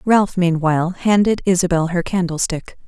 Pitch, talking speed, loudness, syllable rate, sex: 180 Hz, 125 wpm, -17 LUFS, 4.9 syllables/s, female